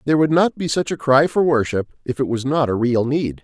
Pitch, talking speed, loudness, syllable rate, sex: 140 Hz, 280 wpm, -19 LUFS, 5.8 syllables/s, male